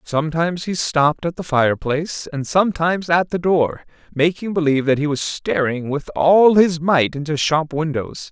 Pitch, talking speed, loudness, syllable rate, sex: 155 Hz, 180 wpm, -18 LUFS, 5.0 syllables/s, male